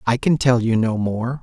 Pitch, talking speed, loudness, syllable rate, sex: 120 Hz, 255 wpm, -19 LUFS, 4.6 syllables/s, male